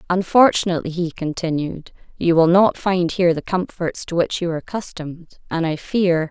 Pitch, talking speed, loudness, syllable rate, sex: 175 Hz, 170 wpm, -19 LUFS, 5.4 syllables/s, female